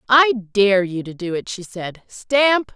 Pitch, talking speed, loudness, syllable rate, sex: 215 Hz, 195 wpm, -18 LUFS, 3.6 syllables/s, female